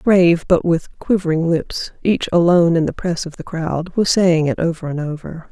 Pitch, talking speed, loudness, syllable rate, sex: 170 Hz, 205 wpm, -17 LUFS, 4.9 syllables/s, female